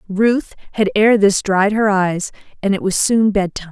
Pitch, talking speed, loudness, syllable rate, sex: 205 Hz, 195 wpm, -16 LUFS, 4.7 syllables/s, female